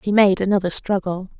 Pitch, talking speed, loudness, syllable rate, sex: 195 Hz, 170 wpm, -19 LUFS, 5.7 syllables/s, female